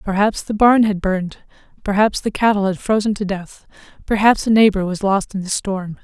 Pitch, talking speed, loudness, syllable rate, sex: 200 Hz, 200 wpm, -17 LUFS, 5.2 syllables/s, female